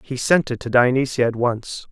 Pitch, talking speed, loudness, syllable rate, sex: 125 Hz, 220 wpm, -19 LUFS, 5.1 syllables/s, male